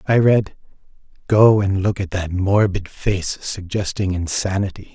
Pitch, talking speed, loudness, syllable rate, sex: 100 Hz, 135 wpm, -19 LUFS, 4.1 syllables/s, male